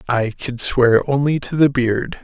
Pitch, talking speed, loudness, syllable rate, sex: 130 Hz, 190 wpm, -17 LUFS, 3.9 syllables/s, male